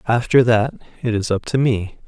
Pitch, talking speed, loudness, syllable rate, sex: 115 Hz, 205 wpm, -18 LUFS, 4.9 syllables/s, male